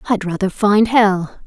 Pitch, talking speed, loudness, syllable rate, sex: 200 Hz, 165 wpm, -16 LUFS, 4.2 syllables/s, female